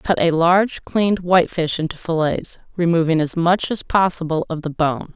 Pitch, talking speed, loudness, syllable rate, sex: 170 Hz, 175 wpm, -19 LUFS, 5.1 syllables/s, female